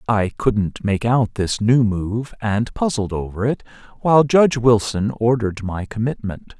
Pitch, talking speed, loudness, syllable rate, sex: 110 Hz, 155 wpm, -19 LUFS, 4.4 syllables/s, male